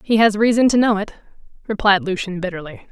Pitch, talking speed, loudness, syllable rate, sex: 205 Hz, 185 wpm, -17 LUFS, 5.9 syllables/s, female